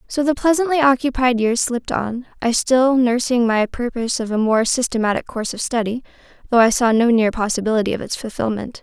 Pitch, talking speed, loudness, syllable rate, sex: 240 Hz, 190 wpm, -18 LUFS, 5.8 syllables/s, female